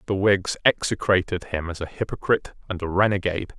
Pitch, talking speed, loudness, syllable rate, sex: 95 Hz, 165 wpm, -23 LUFS, 5.9 syllables/s, male